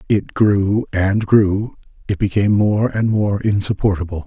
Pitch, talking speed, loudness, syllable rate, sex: 100 Hz, 140 wpm, -17 LUFS, 4.3 syllables/s, male